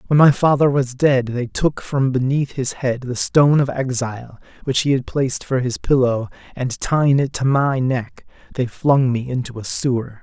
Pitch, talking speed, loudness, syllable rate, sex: 130 Hz, 200 wpm, -19 LUFS, 4.8 syllables/s, male